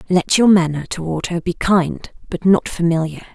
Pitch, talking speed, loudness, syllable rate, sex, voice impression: 175 Hz, 180 wpm, -17 LUFS, 4.8 syllables/s, female, very feminine, slightly young, very thin, slightly relaxed, powerful, bright, soft, very clear, fluent, slightly raspy, cute, intellectual, very refreshing, sincere, slightly calm, friendly, reassuring, very unique, slightly elegant, slightly wild, sweet, lively, slightly strict, slightly intense, slightly sharp, slightly light